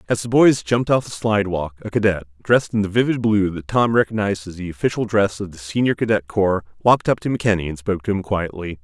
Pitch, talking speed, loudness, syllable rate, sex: 100 Hz, 240 wpm, -20 LUFS, 6.5 syllables/s, male